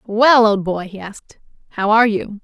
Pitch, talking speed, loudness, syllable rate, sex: 215 Hz, 195 wpm, -15 LUFS, 5.1 syllables/s, female